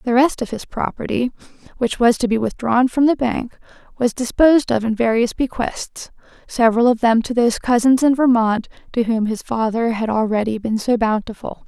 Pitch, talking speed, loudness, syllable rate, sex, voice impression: 235 Hz, 185 wpm, -18 LUFS, 5.2 syllables/s, female, feminine, adult-like, powerful, bright, soft, slightly muffled, intellectual, calm, friendly, reassuring, kind